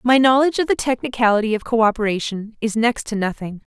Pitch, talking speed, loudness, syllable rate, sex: 230 Hz, 175 wpm, -19 LUFS, 6.3 syllables/s, female